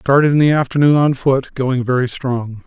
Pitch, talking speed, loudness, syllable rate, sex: 135 Hz, 200 wpm, -15 LUFS, 5.0 syllables/s, male